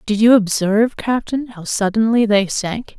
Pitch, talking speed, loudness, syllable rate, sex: 215 Hz, 160 wpm, -17 LUFS, 4.6 syllables/s, female